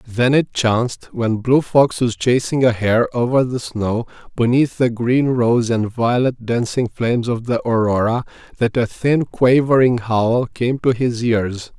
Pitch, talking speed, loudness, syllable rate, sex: 120 Hz, 170 wpm, -17 LUFS, 4.1 syllables/s, male